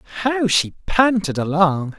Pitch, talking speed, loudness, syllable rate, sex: 185 Hz, 120 wpm, -18 LUFS, 4.3 syllables/s, male